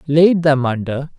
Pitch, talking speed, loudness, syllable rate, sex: 145 Hz, 150 wpm, -16 LUFS, 4.1 syllables/s, male